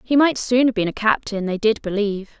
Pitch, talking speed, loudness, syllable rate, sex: 220 Hz, 250 wpm, -20 LUFS, 5.7 syllables/s, female